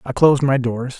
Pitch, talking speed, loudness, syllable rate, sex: 130 Hz, 240 wpm, -17 LUFS, 5.7 syllables/s, male